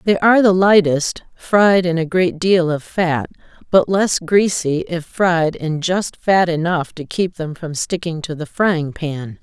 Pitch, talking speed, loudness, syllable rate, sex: 175 Hz, 185 wpm, -17 LUFS, 3.9 syllables/s, female